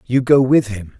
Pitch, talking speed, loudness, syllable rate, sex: 120 Hz, 240 wpm, -14 LUFS, 4.6 syllables/s, male